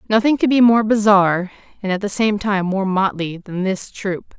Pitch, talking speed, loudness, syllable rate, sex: 200 Hz, 205 wpm, -17 LUFS, 4.9 syllables/s, female